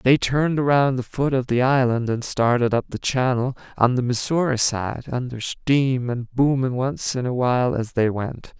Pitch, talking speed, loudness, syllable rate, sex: 125 Hz, 195 wpm, -21 LUFS, 4.7 syllables/s, male